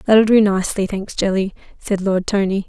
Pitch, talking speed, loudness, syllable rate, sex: 200 Hz, 180 wpm, -18 LUFS, 5.3 syllables/s, female